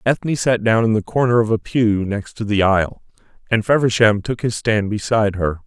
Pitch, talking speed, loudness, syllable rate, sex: 110 Hz, 210 wpm, -18 LUFS, 5.3 syllables/s, male